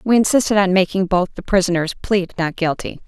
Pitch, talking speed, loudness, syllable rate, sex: 190 Hz, 195 wpm, -18 LUFS, 5.8 syllables/s, female